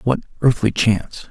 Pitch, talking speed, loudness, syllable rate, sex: 115 Hz, 140 wpm, -18 LUFS, 5.1 syllables/s, male